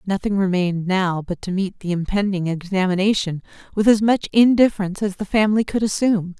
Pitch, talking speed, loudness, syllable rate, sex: 195 Hz, 170 wpm, -20 LUFS, 6.0 syllables/s, female